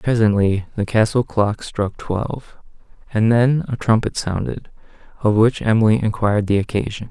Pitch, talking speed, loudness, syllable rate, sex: 110 Hz, 145 wpm, -19 LUFS, 4.9 syllables/s, male